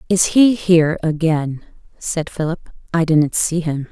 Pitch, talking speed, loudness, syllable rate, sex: 165 Hz, 155 wpm, -17 LUFS, 4.4 syllables/s, female